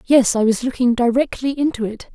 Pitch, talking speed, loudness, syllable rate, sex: 250 Hz, 195 wpm, -18 LUFS, 5.5 syllables/s, female